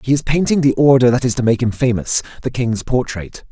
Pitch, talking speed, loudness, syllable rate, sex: 125 Hz, 240 wpm, -16 LUFS, 5.7 syllables/s, male